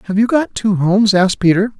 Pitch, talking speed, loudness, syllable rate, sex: 205 Hz, 235 wpm, -14 LUFS, 6.5 syllables/s, male